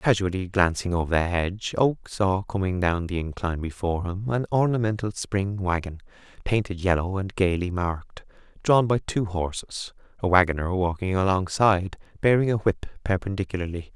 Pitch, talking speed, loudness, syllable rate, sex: 95 Hz, 145 wpm, -25 LUFS, 5.3 syllables/s, male